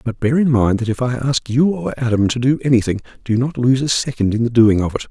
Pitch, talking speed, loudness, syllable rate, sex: 125 Hz, 280 wpm, -17 LUFS, 5.9 syllables/s, male